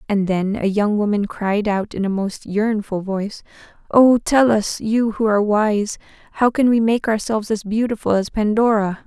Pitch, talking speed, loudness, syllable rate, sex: 210 Hz, 185 wpm, -18 LUFS, 4.7 syllables/s, female